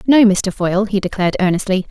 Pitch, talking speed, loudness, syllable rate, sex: 200 Hz, 190 wpm, -16 LUFS, 6.5 syllables/s, female